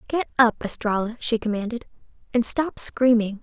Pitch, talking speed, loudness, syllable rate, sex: 235 Hz, 140 wpm, -22 LUFS, 4.9 syllables/s, female